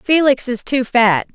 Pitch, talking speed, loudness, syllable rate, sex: 250 Hz, 180 wpm, -15 LUFS, 4.0 syllables/s, female